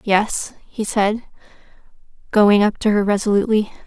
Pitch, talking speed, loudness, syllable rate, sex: 210 Hz, 125 wpm, -18 LUFS, 4.7 syllables/s, female